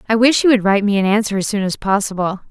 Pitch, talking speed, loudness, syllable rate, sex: 205 Hz, 290 wpm, -16 LUFS, 7.1 syllables/s, female